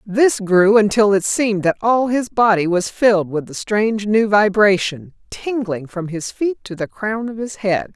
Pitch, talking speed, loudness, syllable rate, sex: 210 Hz, 195 wpm, -17 LUFS, 4.5 syllables/s, female